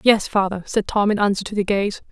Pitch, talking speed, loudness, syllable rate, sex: 200 Hz, 255 wpm, -20 LUFS, 5.7 syllables/s, female